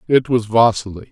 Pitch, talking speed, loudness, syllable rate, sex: 115 Hz, 160 wpm, -15 LUFS, 5.4 syllables/s, male